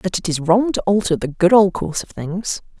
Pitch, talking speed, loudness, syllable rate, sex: 190 Hz, 255 wpm, -18 LUFS, 5.4 syllables/s, female